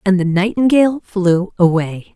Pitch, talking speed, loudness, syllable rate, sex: 195 Hz, 140 wpm, -15 LUFS, 4.6 syllables/s, female